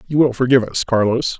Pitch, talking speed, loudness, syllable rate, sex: 125 Hz, 215 wpm, -16 LUFS, 6.4 syllables/s, male